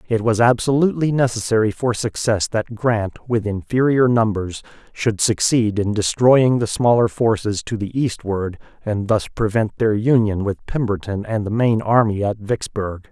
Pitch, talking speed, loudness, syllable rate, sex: 110 Hz, 155 wpm, -19 LUFS, 4.5 syllables/s, male